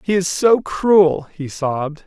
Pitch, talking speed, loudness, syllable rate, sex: 170 Hz, 175 wpm, -17 LUFS, 3.6 syllables/s, male